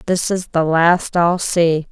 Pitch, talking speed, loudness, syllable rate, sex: 170 Hz, 190 wpm, -16 LUFS, 3.5 syllables/s, female